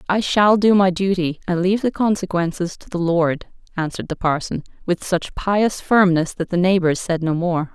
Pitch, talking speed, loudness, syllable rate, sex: 180 Hz, 195 wpm, -19 LUFS, 5.0 syllables/s, female